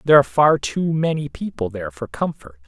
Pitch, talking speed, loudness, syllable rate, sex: 130 Hz, 200 wpm, -20 LUFS, 5.9 syllables/s, male